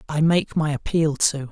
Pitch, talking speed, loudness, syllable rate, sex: 150 Hz, 200 wpm, -21 LUFS, 4.4 syllables/s, male